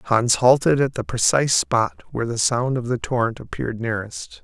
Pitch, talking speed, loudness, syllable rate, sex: 120 Hz, 190 wpm, -20 LUFS, 5.4 syllables/s, male